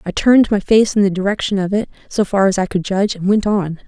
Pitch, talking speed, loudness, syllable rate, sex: 200 Hz, 280 wpm, -16 LUFS, 6.2 syllables/s, female